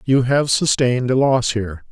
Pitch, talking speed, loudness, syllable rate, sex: 125 Hz, 190 wpm, -17 LUFS, 5.1 syllables/s, male